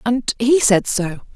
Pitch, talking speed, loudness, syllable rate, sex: 230 Hz, 175 wpm, -17 LUFS, 3.5 syllables/s, female